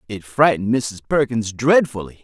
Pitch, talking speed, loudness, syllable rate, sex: 115 Hz, 135 wpm, -18 LUFS, 5.2 syllables/s, male